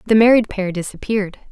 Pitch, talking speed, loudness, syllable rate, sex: 205 Hz, 160 wpm, -17 LUFS, 6.5 syllables/s, female